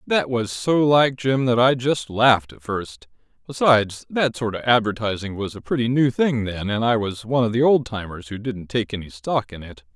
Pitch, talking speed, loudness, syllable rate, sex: 115 Hz, 225 wpm, -21 LUFS, 5.0 syllables/s, male